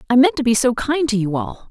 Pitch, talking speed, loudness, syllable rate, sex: 240 Hz, 315 wpm, -18 LUFS, 6.0 syllables/s, female